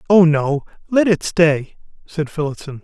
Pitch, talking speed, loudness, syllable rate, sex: 160 Hz, 125 wpm, -17 LUFS, 4.4 syllables/s, male